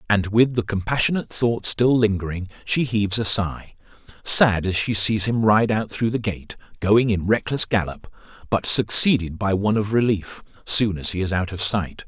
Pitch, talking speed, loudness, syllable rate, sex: 105 Hz, 180 wpm, -21 LUFS, 4.9 syllables/s, male